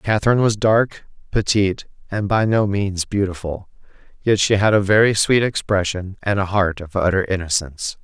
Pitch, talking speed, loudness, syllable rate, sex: 100 Hz, 165 wpm, -19 LUFS, 5.2 syllables/s, male